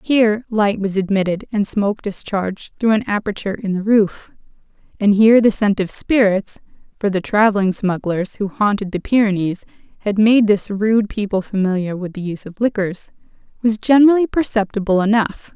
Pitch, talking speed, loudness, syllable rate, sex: 205 Hz, 160 wpm, -17 LUFS, 4.3 syllables/s, female